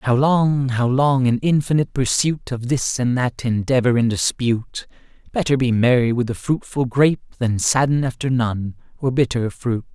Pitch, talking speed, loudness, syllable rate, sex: 125 Hz, 170 wpm, -19 LUFS, 4.8 syllables/s, male